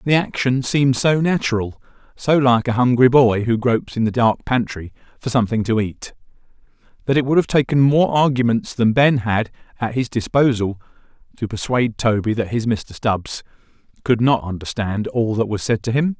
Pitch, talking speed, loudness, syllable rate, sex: 120 Hz, 180 wpm, -18 LUFS, 5.2 syllables/s, male